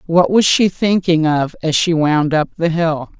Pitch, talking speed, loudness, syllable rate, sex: 165 Hz, 205 wpm, -15 LUFS, 4.2 syllables/s, female